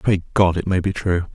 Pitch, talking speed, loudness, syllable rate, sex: 90 Hz, 270 wpm, -20 LUFS, 5.4 syllables/s, male